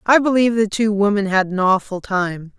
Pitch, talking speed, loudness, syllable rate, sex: 205 Hz, 210 wpm, -17 LUFS, 5.3 syllables/s, female